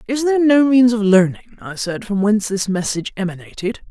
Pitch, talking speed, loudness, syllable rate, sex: 215 Hz, 200 wpm, -17 LUFS, 6.0 syllables/s, female